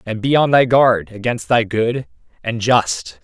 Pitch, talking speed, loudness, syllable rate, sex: 120 Hz, 185 wpm, -16 LUFS, 4.0 syllables/s, male